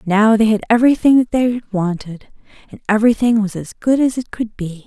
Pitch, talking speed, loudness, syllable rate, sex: 220 Hz, 195 wpm, -16 LUFS, 5.6 syllables/s, female